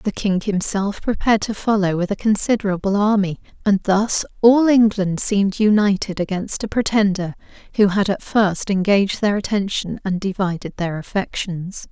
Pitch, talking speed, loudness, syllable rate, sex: 200 Hz, 150 wpm, -19 LUFS, 4.9 syllables/s, female